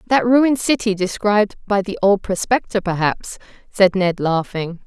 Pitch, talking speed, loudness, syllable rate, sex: 200 Hz, 150 wpm, -18 LUFS, 4.7 syllables/s, female